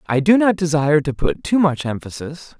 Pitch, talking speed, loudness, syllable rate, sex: 160 Hz, 210 wpm, -18 LUFS, 5.3 syllables/s, male